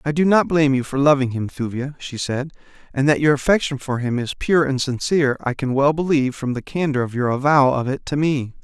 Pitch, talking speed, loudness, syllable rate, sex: 140 Hz, 245 wpm, -19 LUFS, 5.9 syllables/s, male